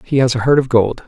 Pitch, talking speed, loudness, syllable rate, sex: 125 Hz, 335 wpm, -14 LUFS, 6.2 syllables/s, male